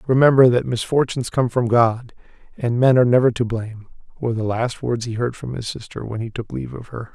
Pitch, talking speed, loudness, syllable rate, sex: 120 Hz, 225 wpm, -20 LUFS, 6.1 syllables/s, male